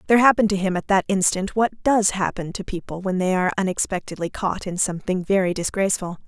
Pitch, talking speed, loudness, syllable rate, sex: 190 Hz, 200 wpm, -22 LUFS, 6.4 syllables/s, female